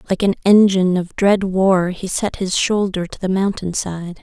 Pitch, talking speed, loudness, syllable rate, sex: 190 Hz, 200 wpm, -17 LUFS, 4.6 syllables/s, female